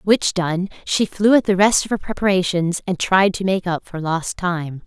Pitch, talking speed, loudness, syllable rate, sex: 185 Hz, 220 wpm, -19 LUFS, 4.6 syllables/s, female